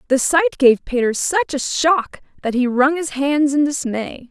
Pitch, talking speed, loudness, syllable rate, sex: 285 Hz, 195 wpm, -17 LUFS, 4.3 syllables/s, female